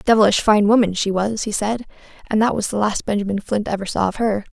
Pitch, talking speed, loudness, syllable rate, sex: 210 Hz, 235 wpm, -19 LUFS, 6.1 syllables/s, female